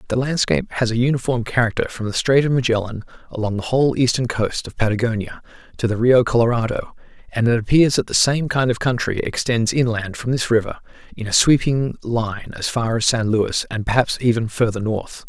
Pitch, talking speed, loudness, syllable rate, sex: 120 Hz, 195 wpm, -19 LUFS, 5.6 syllables/s, male